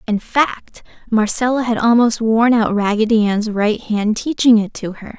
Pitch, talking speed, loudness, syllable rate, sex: 225 Hz, 175 wpm, -16 LUFS, 4.4 syllables/s, female